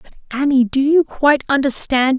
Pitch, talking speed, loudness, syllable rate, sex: 270 Hz, 165 wpm, -16 LUFS, 6.4 syllables/s, female